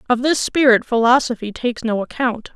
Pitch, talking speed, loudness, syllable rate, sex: 240 Hz, 165 wpm, -17 LUFS, 5.5 syllables/s, female